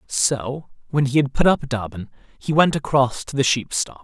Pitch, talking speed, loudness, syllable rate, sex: 130 Hz, 210 wpm, -20 LUFS, 4.6 syllables/s, male